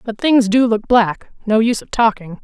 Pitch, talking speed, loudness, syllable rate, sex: 220 Hz, 220 wpm, -15 LUFS, 5.0 syllables/s, female